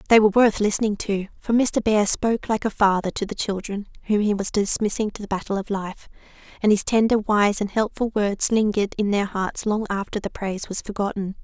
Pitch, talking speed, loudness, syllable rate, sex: 205 Hz, 215 wpm, -22 LUFS, 5.7 syllables/s, female